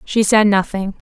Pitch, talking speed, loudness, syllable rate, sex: 205 Hz, 170 wpm, -15 LUFS, 4.5 syllables/s, female